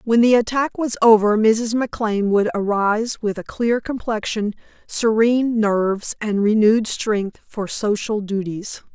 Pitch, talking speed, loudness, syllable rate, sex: 215 Hz, 140 wpm, -19 LUFS, 4.5 syllables/s, female